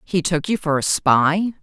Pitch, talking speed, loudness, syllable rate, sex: 165 Hz, 220 wpm, -18 LUFS, 4.3 syllables/s, female